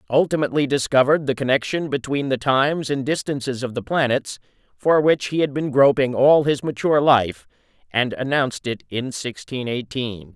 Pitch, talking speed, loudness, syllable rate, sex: 135 Hz, 160 wpm, -20 LUFS, 5.3 syllables/s, male